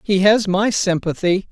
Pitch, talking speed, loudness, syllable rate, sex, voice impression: 195 Hz, 160 wpm, -17 LUFS, 4.3 syllables/s, female, very feminine, very middle-aged, thin, tensed, powerful, bright, slightly soft, very clear, fluent, slightly cool, intellectual, slightly refreshing, sincere, very calm, friendly, reassuring, very unique, slightly elegant, wild, slightly sweet, lively, kind, slightly intense